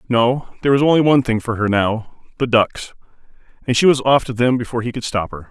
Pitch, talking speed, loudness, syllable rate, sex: 120 Hz, 220 wpm, -17 LUFS, 6.3 syllables/s, male